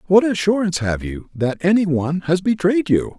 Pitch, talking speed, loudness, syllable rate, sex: 170 Hz, 190 wpm, -19 LUFS, 5.4 syllables/s, male